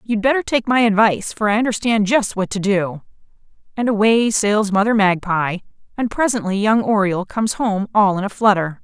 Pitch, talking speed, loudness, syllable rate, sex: 210 Hz, 175 wpm, -17 LUFS, 5.4 syllables/s, female